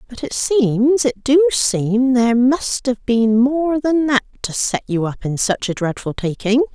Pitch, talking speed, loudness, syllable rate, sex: 250 Hz, 185 wpm, -17 LUFS, 4.0 syllables/s, female